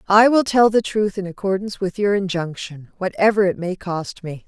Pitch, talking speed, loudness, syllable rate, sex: 190 Hz, 200 wpm, -19 LUFS, 5.2 syllables/s, female